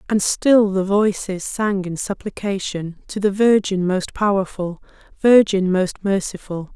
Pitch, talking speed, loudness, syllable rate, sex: 195 Hz, 135 wpm, -19 LUFS, 4.1 syllables/s, female